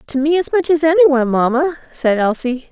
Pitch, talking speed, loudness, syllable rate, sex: 285 Hz, 200 wpm, -15 LUFS, 5.4 syllables/s, female